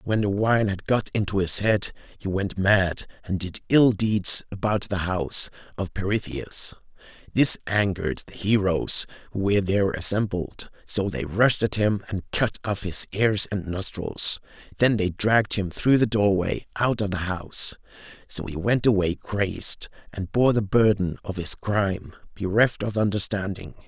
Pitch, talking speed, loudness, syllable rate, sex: 100 Hz, 165 wpm, -24 LUFS, 4.5 syllables/s, male